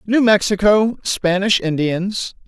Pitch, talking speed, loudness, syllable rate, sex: 200 Hz, 95 wpm, -17 LUFS, 3.7 syllables/s, male